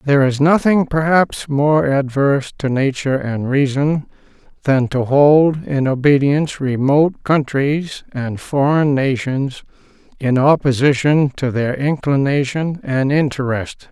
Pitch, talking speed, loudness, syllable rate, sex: 140 Hz, 115 wpm, -16 LUFS, 4.1 syllables/s, male